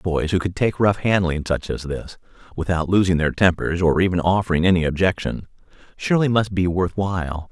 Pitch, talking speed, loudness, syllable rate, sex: 90 Hz, 185 wpm, -20 LUFS, 5.5 syllables/s, male